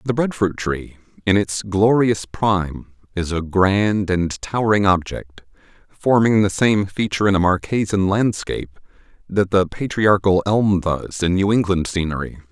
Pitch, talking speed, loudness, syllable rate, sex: 100 Hz, 150 wpm, -19 LUFS, 4.5 syllables/s, male